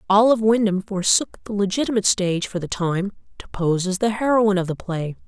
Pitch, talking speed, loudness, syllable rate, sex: 200 Hz, 195 wpm, -21 LUFS, 6.0 syllables/s, female